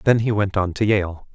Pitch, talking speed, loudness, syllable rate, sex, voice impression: 100 Hz, 270 wpm, -20 LUFS, 4.7 syllables/s, male, very masculine, very adult-like, thick, slightly relaxed, powerful, bright, soft, muffled, fluent, slightly raspy, very cool, intellectual, slightly refreshing, very sincere, very calm, very mature, very friendly, very reassuring, very unique, elegant, wild, sweet, slightly lively, very kind, modest